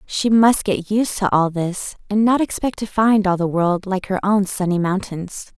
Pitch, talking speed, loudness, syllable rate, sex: 195 Hz, 215 wpm, -19 LUFS, 4.5 syllables/s, female